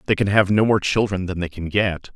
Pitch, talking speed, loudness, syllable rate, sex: 95 Hz, 280 wpm, -20 LUFS, 5.6 syllables/s, male